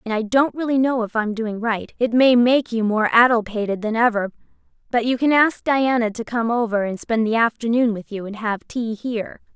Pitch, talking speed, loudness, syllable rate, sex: 230 Hz, 200 wpm, -20 LUFS, 5.2 syllables/s, female